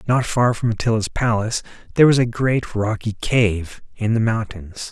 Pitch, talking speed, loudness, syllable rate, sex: 110 Hz, 170 wpm, -19 LUFS, 4.9 syllables/s, male